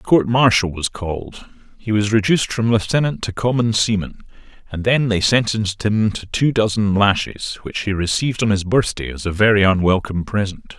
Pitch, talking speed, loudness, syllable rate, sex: 105 Hz, 185 wpm, -18 LUFS, 5.4 syllables/s, male